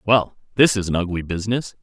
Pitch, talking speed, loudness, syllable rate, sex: 100 Hz, 200 wpm, -20 LUFS, 6.2 syllables/s, male